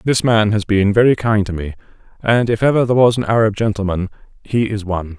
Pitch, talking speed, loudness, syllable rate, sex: 105 Hz, 220 wpm, -16 LUFS, 6.1 syllables/s, male